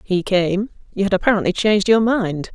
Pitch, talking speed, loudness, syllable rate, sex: 200 Hz, 190 wpm, -18 LUFS, 5.4 syllables/s, female